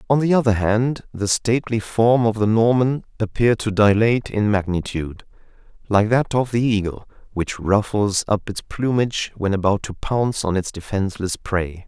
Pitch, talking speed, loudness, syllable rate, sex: 110 Hz, 165 wpm, -20 LUFS, 5.0 syllables/s, male